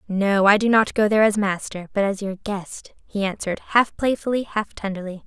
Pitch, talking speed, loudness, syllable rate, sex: 205 Hz, 205 wpm, -21 LUFS, 5.4 syllables/s, female